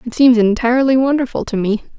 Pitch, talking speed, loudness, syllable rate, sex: 240 Hz, 180 wpm, -15 LUFS, 6.3 syllables/s, female